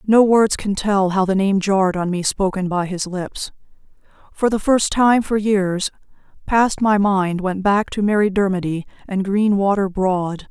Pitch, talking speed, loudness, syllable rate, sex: 195 Hz, 175 wpm, -18 LUFS, 4.3 syllables/s, female